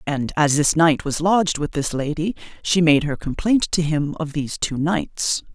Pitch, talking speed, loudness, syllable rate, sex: 155 Hz, 205 wpm, -20 LUFS, 4.6 syllables/s, female